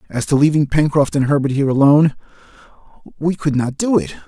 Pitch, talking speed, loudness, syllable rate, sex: 145 Hz, 180 wpm, -16 LUFS, 6.4 syllables/s, male